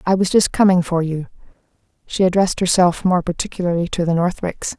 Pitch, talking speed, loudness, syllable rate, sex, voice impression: 180 Hz, 175 wpm, -18 LUFS, 5.9 syllables/s, female, feminine, adult-like, relaxed, weak, soft, fluent, slightly raspy, calm, friendly, reassuring, elegant, kind, modest